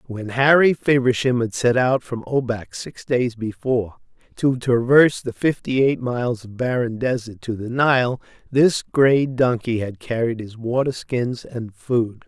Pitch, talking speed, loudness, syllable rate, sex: 125 Hz, 160 wpm, -20 LUFS, 4.2 syllables/s, male